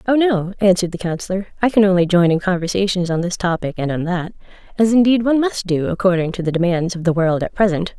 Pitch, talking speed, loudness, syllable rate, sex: 185 Hz, 235 wpm, -17 LUFS, 6.4 syllables/s, female